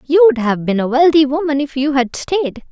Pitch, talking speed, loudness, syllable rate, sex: 285 Hz, 245 wpm, -15 LUFS, 5.2 syllables/s, female